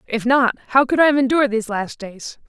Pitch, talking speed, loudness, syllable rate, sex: 245 Hz, 240 wpm, -17 LUFS, 6.3 syllables/s, female